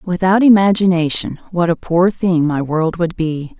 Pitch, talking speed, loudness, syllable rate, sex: 175 Hz, 165 wpm, -15 LUFS, 4.4 syllables/s, female